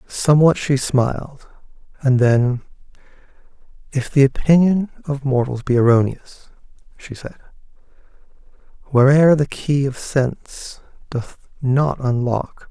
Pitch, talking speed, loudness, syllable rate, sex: 135 Hz, 105 wpm, -18 LUFS, 4.1 syllables/s, male